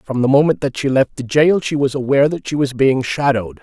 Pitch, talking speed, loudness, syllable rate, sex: 135 Hz, 265 wpm, -16 LUFS, 5.9 syllables/s, male